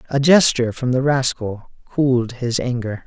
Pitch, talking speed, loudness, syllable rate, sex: 125 Hz, 155 wpm, -18 LUFS, 4.7 syllables/s, male